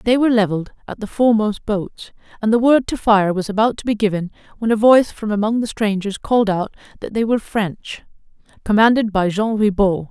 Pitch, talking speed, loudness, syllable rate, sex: 215 Hz, 200 wpm, -17 LUFS, 5.8 syllables/s, female